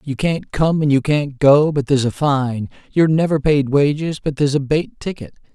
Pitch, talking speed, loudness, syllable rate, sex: 145 Hz, 215 wpm, -17 LUFS, 5.3 syllables/s, male